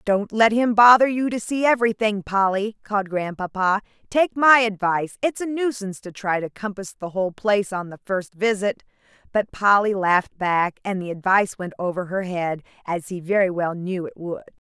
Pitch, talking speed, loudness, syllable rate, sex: 200 Hz, 185 wpm, -21 LUFS, 5.2 syllables/s, female